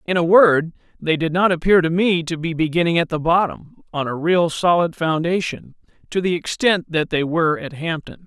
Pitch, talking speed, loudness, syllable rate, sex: 170 Hz, 205 wpm, -19 LUFS, 5.1 syllables/s, male